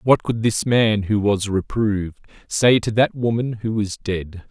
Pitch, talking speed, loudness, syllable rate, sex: 110 Hz, 185 wpm, -20 LUFS, 4.1 syllables/s, male